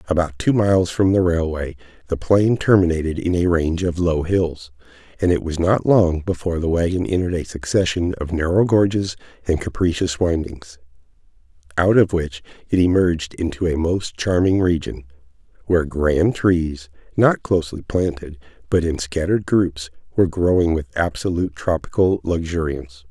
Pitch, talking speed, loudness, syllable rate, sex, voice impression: 85 Hz, 150 wpm, -19 LUFS, 5.2 syllables/s, male, very masculine, very adult-like, slightly thick, slightly muffled, cool, sincere, slightly friendly, reassuring, slightly kind